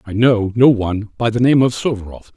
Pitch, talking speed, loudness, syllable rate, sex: 115 Hz, 230 wpm, -15 LUFS, 5.5 syllables/s, male